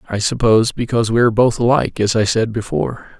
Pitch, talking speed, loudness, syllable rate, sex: 115 Hz, 205 wpm, -16 LUFS, 6.9 syllables/s, male